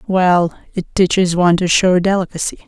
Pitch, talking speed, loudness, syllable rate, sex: 180 Hz, 155 wpm, -15 LUFS, 5.3 syllables/s, female